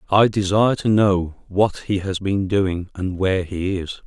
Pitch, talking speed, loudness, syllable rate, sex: 95 Hz, 190 wpm, -20 LUFS, 4.4 syllables/s, male